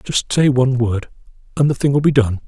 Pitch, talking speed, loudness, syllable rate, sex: 130 Hz, 220 wpm, -16 LUFS, 5.3 syllables/s, male